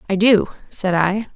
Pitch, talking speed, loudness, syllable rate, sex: 200 Hz, 180 wpm, -17 LUFS, 4.4 syllables/s, female